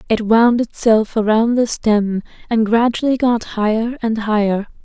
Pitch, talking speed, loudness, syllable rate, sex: 225 Hz, 150 wpm, -16 LUFS, 4.0 syllables/s, female